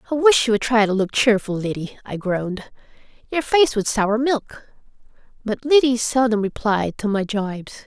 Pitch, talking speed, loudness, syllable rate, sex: 225 Hz, 175 wpm, -20 LUFS, 4.9 syllables/s, female